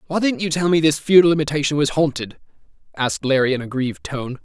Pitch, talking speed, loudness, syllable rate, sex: 145 Hz, 215 wpm, -19 LUFS, 6.5 syllables/s, male